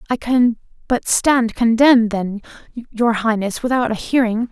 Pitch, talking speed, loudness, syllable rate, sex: 230 Hz, 145 wpm, -17 LUFS, 4.3 syllables/s, female